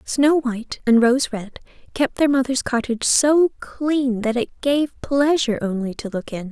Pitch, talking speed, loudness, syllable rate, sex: 255 Hz, 175 wpm, -20 LUFS, 4.5 syllables/s, female